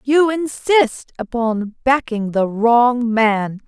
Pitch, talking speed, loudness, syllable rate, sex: 240 Hz, 115 wpm, -17 LUFS, 2.9 syllables/s, female